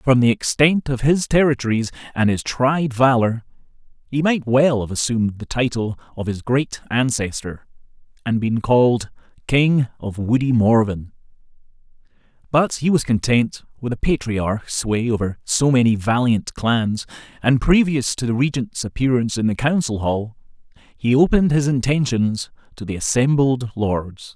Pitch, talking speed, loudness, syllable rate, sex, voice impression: 125 Hz, 145 wpm, -19 LUFS, 4.6 syllables/s, male, masculine, middle-aged, tensed, powerful, bright, raspy, friendly, wild, lively, slightly intense